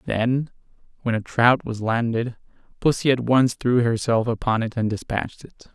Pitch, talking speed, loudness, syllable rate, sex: 115 Hz, 165 wpm, -22 LUFS, 4.8 syllables/s, male